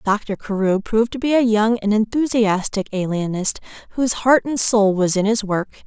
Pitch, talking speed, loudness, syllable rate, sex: 215 Hz, 185 wpm, -19 LUFS, 5.2 syllables/s, female